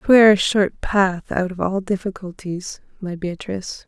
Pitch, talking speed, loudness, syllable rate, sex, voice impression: 190 Hz, 155 wpm, -20 LUFS, 4.6 syllables/s, female, feminine, adult-like, slightly soft, calm, reassuring, slightly sweet